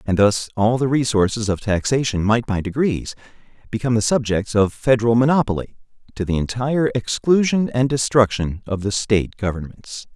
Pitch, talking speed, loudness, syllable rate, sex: 115 Hz, 155 wpm, -19 LUFS, 5.4 syllables/s, male